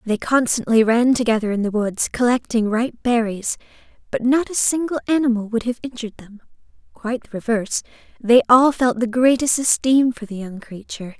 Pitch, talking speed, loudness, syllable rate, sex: 235 Hz, 170 wpm, -19 LUFS, 5.5 syllables/s, female